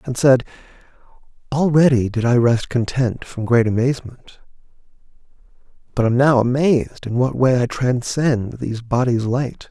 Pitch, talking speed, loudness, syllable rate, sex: 125 Hz, 135 wpm, -18 LUFS, 4.7 syllables/s, male